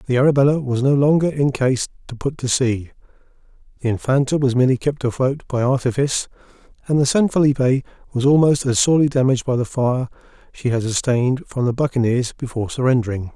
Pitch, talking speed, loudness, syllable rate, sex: 130 Hz, 175 wpm, -19 LUFS, 6.3 syllables/s, male